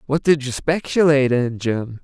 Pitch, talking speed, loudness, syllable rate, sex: 140 Hz, 175 wpm, -19 LUFS, 4.8 syllables/s, male